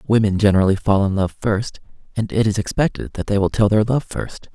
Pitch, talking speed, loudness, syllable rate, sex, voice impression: 105 Hz, 225 wpm, -19 LUFS, 5.8 syllables/s, male, masculine, adult-like, slightly middle-aged, thick, slightly relaxed, slightly weak, slightly bright, soft, slightly clear, slightly fluent, very cool, intellectual, refreshing, very sincere, very calm, mature, friendly, very reassuring, unique, very elegant, slightly wild, sweet, lively, very kind, slightly modest